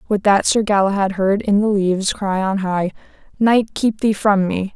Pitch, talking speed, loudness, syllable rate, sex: 200 Hz, 200 wpm, -17 LUFS, 4.7 syllables/s, female